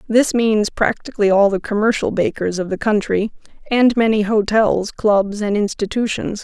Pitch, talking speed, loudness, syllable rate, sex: 210 Hz, 150 wpm, -17 LUFS, 4.7 syllables/s, female